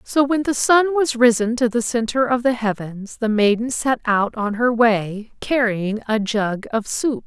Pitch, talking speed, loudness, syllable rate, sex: 235 Hz, 200 wpm, -19 LUFS, 4.2 syllables/s, female